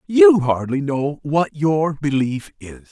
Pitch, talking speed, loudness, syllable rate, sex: 140 Hz, 145 wpm, -18 LUFS, 3.5 syllables/s, male